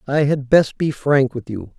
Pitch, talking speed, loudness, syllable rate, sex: 135 Hz, 235 wpm, -18 LUFS, 4.3 syllables/s, male